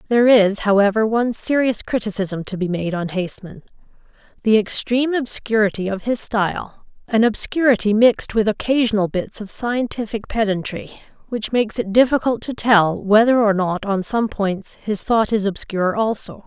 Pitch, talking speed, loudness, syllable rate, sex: 215 Hz, 155 wpm, -19 LUFS, 5.1 syllables/s, female